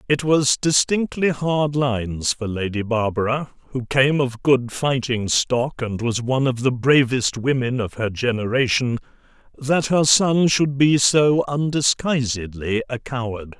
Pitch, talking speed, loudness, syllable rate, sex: 130 Hz, 145 wpm, -20 LUFS, 4.1 syllables/s, male